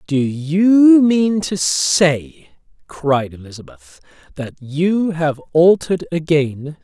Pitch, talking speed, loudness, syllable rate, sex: 155 Hz, 105 wpm, -15 LUFS, 3.2 syllables/s, male